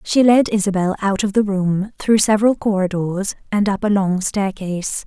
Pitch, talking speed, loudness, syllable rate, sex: 200 Hz, 180 wpm, -18 LUFS, 5.0 syllables/s, female